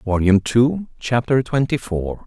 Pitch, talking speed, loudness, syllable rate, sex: 115 Hz, 135 wpm, -19 LUFS, 4.2 syllables/s, male